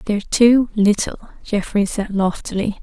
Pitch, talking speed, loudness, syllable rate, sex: 210 Hz, 125 wpm, -18 LUFS, 4.4 syllables/s, female